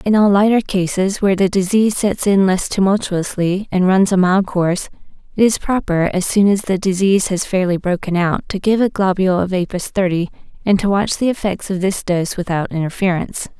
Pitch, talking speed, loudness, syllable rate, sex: 190 Hz, 200 wpm, -16 LUFS, 5.5 syllables/s, female